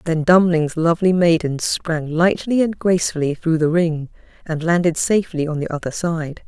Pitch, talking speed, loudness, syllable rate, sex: 165 Hz, 165 wpm, -18 LUFS, 5.0 syllables/s, female